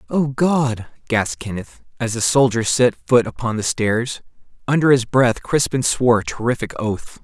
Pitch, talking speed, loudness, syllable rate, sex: 120 Hz, 165 wpm, -19 LUFS, 4.7 syllables/s, male